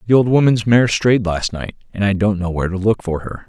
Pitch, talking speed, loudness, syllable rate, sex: 105 Hz, 275 wpm, -17 LUFS, 5.7 syllables/s, male